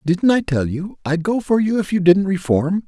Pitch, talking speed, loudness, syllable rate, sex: 185 Hz, 250 wpm, -18 LUFS, 4.8 syllables/s, male